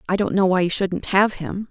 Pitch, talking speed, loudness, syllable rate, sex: 190 Hz, 280 wpm, -20 LUFS, 5.2 syllables/s, female